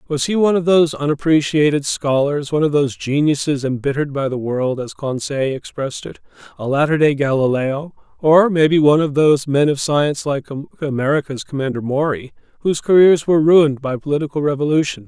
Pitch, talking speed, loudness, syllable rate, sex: 145 Hz, 165 wpm, -17 LUFS, 6.2 syllables/s, male